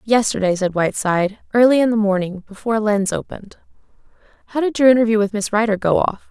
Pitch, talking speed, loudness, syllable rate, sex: 215 Hz, 180 wpm, -18 LUFS, 6.6 syllables/s, female